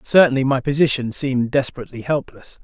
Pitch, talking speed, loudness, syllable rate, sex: 135 Hz, 135 wpm, -19 LUFS, 6.3 syllables/s, male